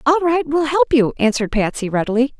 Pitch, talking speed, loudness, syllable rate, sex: 260 Hz, 200 wpm, -17 LUFS, 6.2 syllables/s, female